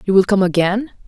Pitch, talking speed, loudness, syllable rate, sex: 200 Hz, 225 wpm, -16 LUFS, 6.0 syllables/s, female